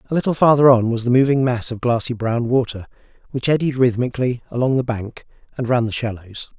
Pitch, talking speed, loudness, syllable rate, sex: 125 Hz, 200 wpm, -18 LUFS, 5.9 syllables/s, male